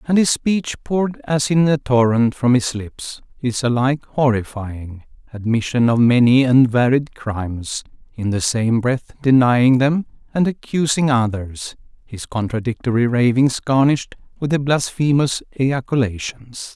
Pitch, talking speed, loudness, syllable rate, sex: 125 Hz, 125 wpm, -18 LUFS, 4.3 syllables/s, male